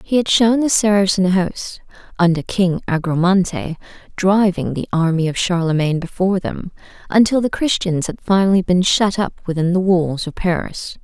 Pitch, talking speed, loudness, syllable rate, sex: 185 Hz, 160 wpm, -17 LUFS, 4.9 syllables/s, female